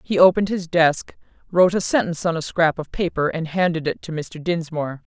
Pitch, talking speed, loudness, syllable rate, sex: 165 Hz, 210 wpm, -21 LUFS, 5.8 syllables/s, female